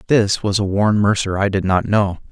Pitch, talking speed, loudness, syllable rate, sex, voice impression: 100 Hz, 235 wpm, -17 LUFS, 5.4 syllables/s, male, very masculine, middle-aged, very thick, very tensed, very powerful, dark, hard, very muffled, fluent, raspy, very cool, intellectual, slightly refreshing, slightly sincere, very calm, very mature, friendly, very reassuring, very unique, elegant, very wild, sweet, lively, slightly kind, modest